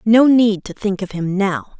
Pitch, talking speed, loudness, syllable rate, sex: 205 Hz, 235 wpm, -17 LUFS, 4.2 syllables/s, female